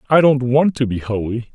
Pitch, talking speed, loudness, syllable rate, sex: 125 Hz, 235 wpm, -17 LUFS, 5.2 syllables/s, male